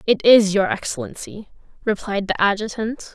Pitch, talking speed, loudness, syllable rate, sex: 210 Hz, 135 wpm, -19 LUFS, 4.9 syllables/s, female